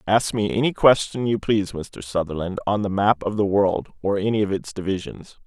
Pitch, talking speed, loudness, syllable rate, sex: 100 Hz, 210 wpm, -22 LUFS, 5.4 syllables/s, male